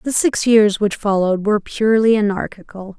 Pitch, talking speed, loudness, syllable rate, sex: 210 Hz, 160 wpm, -16 LUFS, 5.6 syllables/s, female